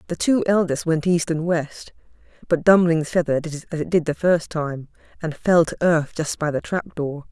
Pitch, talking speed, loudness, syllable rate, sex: 165 Hz, 205 wpm, -21 LUFS, 4.8 syllables/s, female